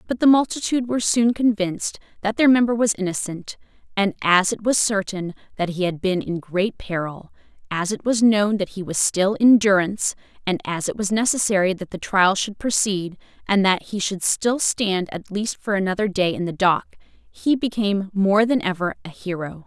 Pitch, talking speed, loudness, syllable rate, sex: 200 Hz, 190 wpm, -21 LUFS, 5.1 syllables/s, female